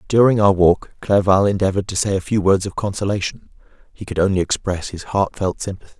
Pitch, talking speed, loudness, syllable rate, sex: 95 Hz, 190 wpm, -18 LUFS, 6.0 syllables/s, male